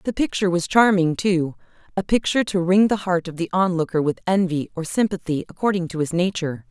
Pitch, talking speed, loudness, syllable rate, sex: 180 Hz, 190 wpm, -21 LUFS, 6.0 syllables/s, female